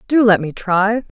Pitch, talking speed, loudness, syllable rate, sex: 210 Hz, 205 wpm, -16 LUFS, 4.4 syllables/s, female